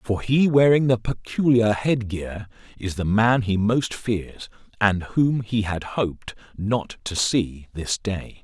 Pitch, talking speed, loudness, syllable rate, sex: 110 Hz, 165 wpm, -22 LUFS, 3.7 syllables/s, male